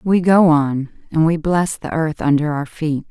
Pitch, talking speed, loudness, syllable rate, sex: 155 Hz, 215 wpm, -17 LUFS, 4.2 syllables/s, female